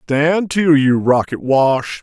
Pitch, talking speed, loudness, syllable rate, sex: 145 Hz, 150 wpm, -15 LUFS, 3.0 syllables/s, male